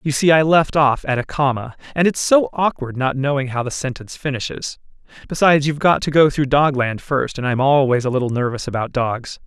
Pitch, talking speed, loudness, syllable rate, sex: 140 Hz, 215 wpm, -18 LUFS, 5.7 syllables/s, male